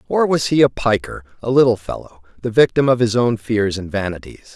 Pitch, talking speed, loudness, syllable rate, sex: 120 Hz, 210 wpm, -17 LUFS, 5.5 syllables/s, male